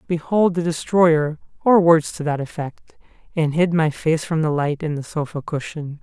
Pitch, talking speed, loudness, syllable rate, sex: 160 Hz, 170 wpm, -20 LUFS, 4.5 syllables/s, male